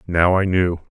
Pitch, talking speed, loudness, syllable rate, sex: 90 Hz, 190 wpm, -18 LUFS, 4.3 syllables/s, male